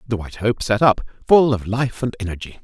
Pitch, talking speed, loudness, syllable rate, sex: 110 Hz, 230 wpm, -19 LUFS, 5.8 syllables/s, male